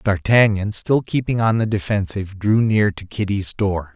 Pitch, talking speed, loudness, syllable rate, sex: 100 Hz, 180 wpm, -19 LUFS, 4.9 syllables/s, male